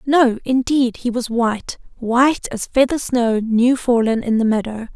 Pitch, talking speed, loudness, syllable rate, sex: 240 Hz, 160 wpm, -18 LUFS, 4.4 syllables/s, female